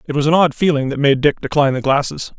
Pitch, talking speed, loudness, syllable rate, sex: 145 Hz, 275 wpm, -16 LUFS, 6.6 syllables/s, male